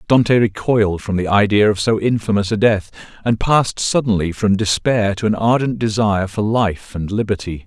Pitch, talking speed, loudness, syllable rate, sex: 105 Hz, 180 wpm, -17 LUFS, 5.3 syllables/s, male